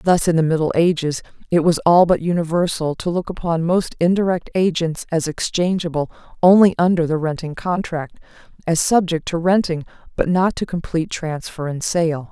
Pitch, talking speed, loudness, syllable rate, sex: 170 Hz, 165 wpm, -19 LUFS, 5.2 syllables/s, female